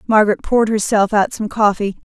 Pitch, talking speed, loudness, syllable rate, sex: 215 Hz, 170 wpm, -16 LUFS, 6.0 syllables/s, female